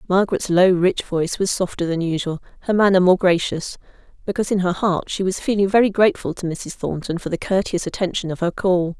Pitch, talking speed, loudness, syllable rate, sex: 185 Hz, 205 wpm, -20 LUFS, 5.9 syllables/s, female